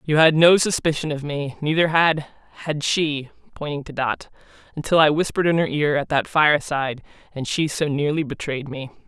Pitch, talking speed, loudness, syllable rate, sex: 150 Hz, 180 wpm, -20 LUFS, 5.3 syllables/s, female